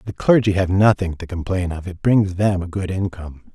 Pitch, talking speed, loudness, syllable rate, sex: 95 Hz, 220 wpm, -19 LUFS, 5.4 syllables/s, male